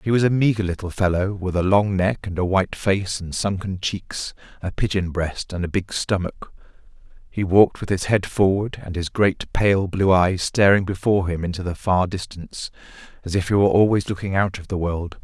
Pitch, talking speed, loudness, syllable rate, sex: 95 Hz, 210 wpm, -21 LUFS, 5.3 syllables/s, male